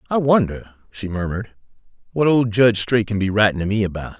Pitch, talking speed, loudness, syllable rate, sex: 110 Hz, 200 wpm, -19 LUFS, 6.2 syllables/s, male